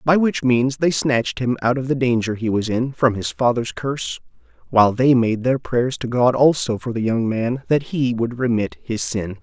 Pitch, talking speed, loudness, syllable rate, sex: 125 Hz, 225 wpm, -19 LUFS, 4.8 syllables/s, male